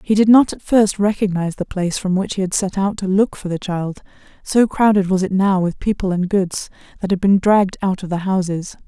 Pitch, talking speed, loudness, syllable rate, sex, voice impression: 190 Hz, 245 wpm, -18 LUFS, 5.5 syllables/s, female, feminine, adult-like, relaxed, weak, slightly soft, raspy, intellectual, calm, reassuring, elegant, slightly kind, modest